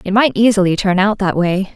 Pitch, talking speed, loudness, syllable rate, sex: 195 Hz, 240 wpm, -14 LUFS, 5.6 syllables/s, female